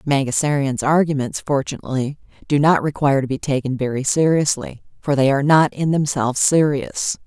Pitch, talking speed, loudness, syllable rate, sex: 140 Hz, 150 wpm, -18 LUFS, 5.6 syllables/s, female